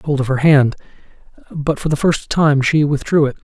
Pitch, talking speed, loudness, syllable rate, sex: 145 Hz, 240 wpm, -16 LUFS, 5.8 syllables/s, male